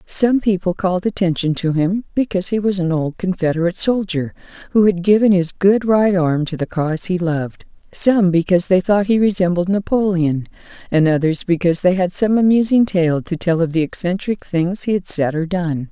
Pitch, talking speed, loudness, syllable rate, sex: 180 Hz, 190 wpm, -17 LUFS, 5.4 syllables/s, female